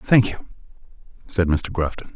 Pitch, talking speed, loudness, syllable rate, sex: 90 Hz, 140 wpm, -22 LUFS, 5.0 syllables/s, male